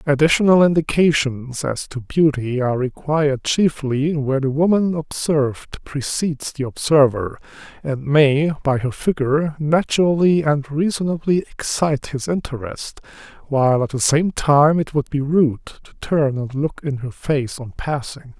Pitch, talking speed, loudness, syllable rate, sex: 145 Hz, 145 wpm, -19 LUFS, 4.5 syllables/s, male